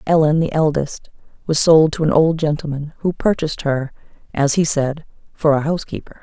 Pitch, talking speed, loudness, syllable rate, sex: 155 Hz, 175 wpm, -18 LUFS, 5.4 syllables/s, female